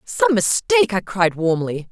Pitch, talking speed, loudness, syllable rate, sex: 200 Hz, 155 wpm, -18 LUFS, 4.4 syllables/s, female